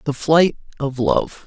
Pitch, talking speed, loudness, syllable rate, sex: 145 Hz, 165 wpm, -19 LUFS, 3.6 syllables/s, male